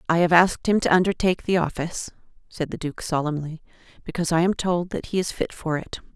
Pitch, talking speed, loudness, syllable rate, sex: 170 Hz, 215 wpm, -23 LUFS, 6.3 syllables/s, female